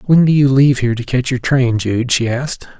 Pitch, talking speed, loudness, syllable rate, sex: 125 Hz, 260 wpm, -14 LUFS, 5.9 syllables/s, male